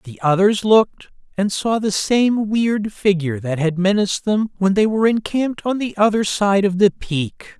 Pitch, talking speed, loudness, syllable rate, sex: 200 Hz, 190 wpm, -18 LUFS, 4.8 syllables/s, male